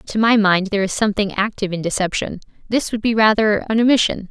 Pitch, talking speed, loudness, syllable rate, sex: 210 Hz, 210 wpm, -17 LUFS, 6.5 syllables/s, female